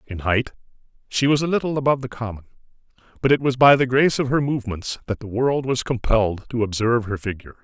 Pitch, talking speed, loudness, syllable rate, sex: 120 Hz, 210 wpm, -21 LUFS, 6.7 syllables/s, male